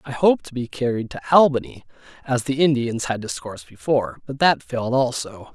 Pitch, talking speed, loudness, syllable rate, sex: 130 Hz, 185 wpm, -21 LUFS, 5.9 syllables/s, male